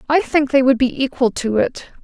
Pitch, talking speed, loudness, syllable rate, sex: 265 Hz, 235 wpm, -17 LUFS, 5.1 syllables/s, female